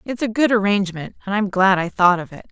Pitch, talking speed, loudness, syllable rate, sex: 200 Hz, 260 wpm, -18 LUFS, 6.1 syllables/s, female